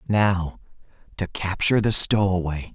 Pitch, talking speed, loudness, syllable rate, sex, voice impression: 95 Hz, 110 wpm, -21 LUFS, 4.4 syllables/s, male, very masculine, middle-aged, very thick, tensed, very powerful, very bright, soft, very clear, fluent, very cool, very intellectual, slightly refreshing, sincere, calm, very mature, very friendly, very reassuring, unique, elegant, wild, very sweet, very lively, very kind, slightly intense